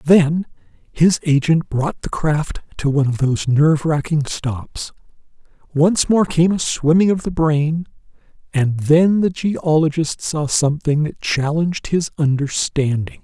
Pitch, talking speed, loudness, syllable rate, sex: 155 Hz, 140 wpm, -18 LUFS, 4.2 syllables/s, male